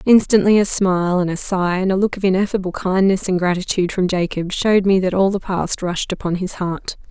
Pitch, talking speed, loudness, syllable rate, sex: 190 Hz, 220 wpm, -18 LUFS, 5.7 syllables/s, female